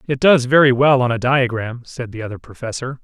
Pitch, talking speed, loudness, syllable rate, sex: 125 Hz, 215 wpm, -16 LUFS, 5.6 syllables/s, male